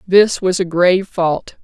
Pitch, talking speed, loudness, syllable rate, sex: 180 Hz, 185 wpm, -15 LUFS, 4.1 syllables/s, female